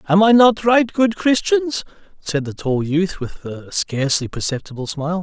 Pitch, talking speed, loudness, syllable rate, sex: 180 Hz, 170 wpm, -18 LUFS, 4.7 syllables/s, male